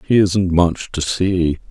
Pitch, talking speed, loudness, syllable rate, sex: 90 Hz, 175 wpm, -17 LUFS, 3.4 syllables/s, male